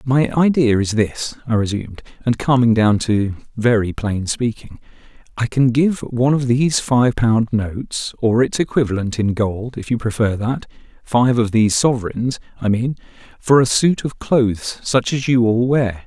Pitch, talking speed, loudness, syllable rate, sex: 120 Hz, 170 wpm, -18 LUFS, 4.6 syllables/s, male